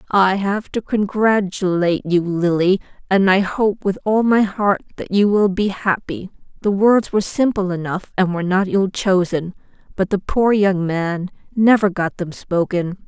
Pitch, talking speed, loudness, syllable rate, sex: 190 Hz, 170 wpm, -18 LUFS, 4.3 syllables/s, female